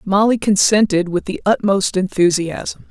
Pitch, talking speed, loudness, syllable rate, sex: 195 Hz, 125 wpm, -16 LUFS, 4.4 syllables/s, female